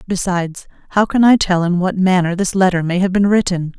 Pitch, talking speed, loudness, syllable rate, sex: 185 Hz, 220 wpm, -15 LUFS, 5.7 syllables/s, female